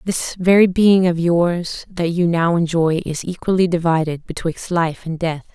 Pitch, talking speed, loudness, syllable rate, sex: 170 Hz, 175 wpm, -18 LUFS, 4.4 syllables/s, female